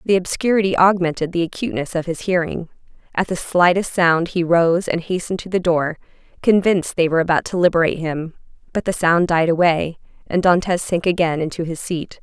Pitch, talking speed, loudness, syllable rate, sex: 175 Hz, 185 wpm, -18 LUFS, 5.8 syllables/s, female